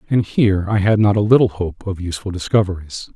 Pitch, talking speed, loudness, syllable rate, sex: 100 Hz, 210 wpm, -17 LUFS, 6.1 syllables/s, male